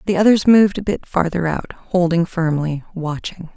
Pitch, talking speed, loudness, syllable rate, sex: 175 Hz, 170 wpm, -18 LUFS, 4.9 syllables/s, female